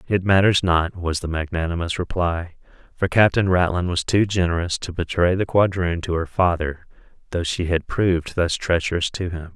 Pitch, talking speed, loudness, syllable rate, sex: 90 Hz, 175 wpm, -21 LUFS, 5.1 syllables/s, male